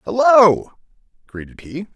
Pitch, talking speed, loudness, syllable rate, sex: 165 Hz, 90 wpm, -13 LUFS, 2.8 syllables/s, male